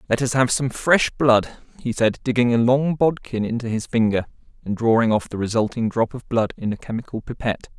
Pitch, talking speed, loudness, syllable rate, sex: 120 Hz, 210 wpm, -21 LUFS, 5.5 syllables/s, male